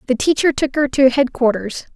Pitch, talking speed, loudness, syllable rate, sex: 260 Hz, 185 wpm, -16 LUFS, 5.3 syllables/s, female